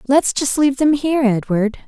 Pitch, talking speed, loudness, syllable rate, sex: 260 Hz, 190 wpm, -17 LUFS, 5.3 syllables/s, female